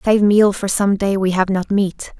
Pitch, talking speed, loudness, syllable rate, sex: 195 Hz, 245 wpm, -16 LUFS, 4.3 syllables/s, female